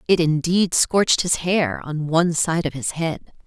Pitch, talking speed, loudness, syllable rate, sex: 165 Hz, 190 wpm, -20 LUFS, 4.4 syllables/s, female